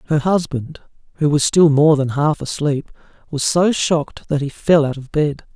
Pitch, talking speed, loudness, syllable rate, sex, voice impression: 150 Hz, 195 wpm, -17 LUFS, 4.7 syllables/s, male, masculine, adult-like, slightly soft, slightly calm, friendly, kind